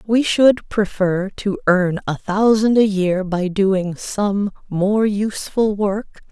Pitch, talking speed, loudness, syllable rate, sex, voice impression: 200 Hz, 140 wpm, -18 LUFS, 3.4 syllables/s, female, very feminine, slightly young, very adult-like, thin, slightly relaxed, slightly weak, bright, slightly soft, clear, fluent, cute, intellectual, very refreshing, sincere, calm, very friendly, very reassuring, unique, very elegant, sweet, lively, very kind, modest, slightly light